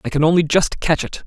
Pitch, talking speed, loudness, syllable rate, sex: 165 Hz, 285 wpm, -17 LUFS, 6.1 syllables/s, male